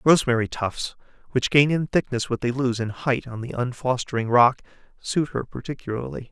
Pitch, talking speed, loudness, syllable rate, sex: 125 Hz, 170 wpm, -23 LUFS, 5.4 syllables/s, male